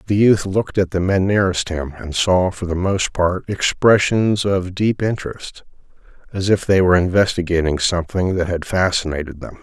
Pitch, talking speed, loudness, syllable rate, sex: 90 Hz, 175 wpm, -18 LUFS, 5.2 syllables/s, male